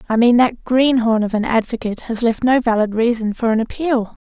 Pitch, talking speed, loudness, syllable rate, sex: 235 Hz, 210 wpm, -17 LUFS, 5.5 syllables/s, female